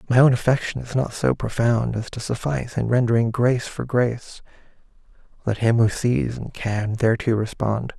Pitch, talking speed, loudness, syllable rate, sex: 120 Hz, 175 wpm, -22 LUFS, 5.2 syllables/s, male